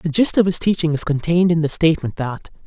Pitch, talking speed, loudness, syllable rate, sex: 165 Hz, 250 wpm, -18 LUFS, 6.4 syllables/s, female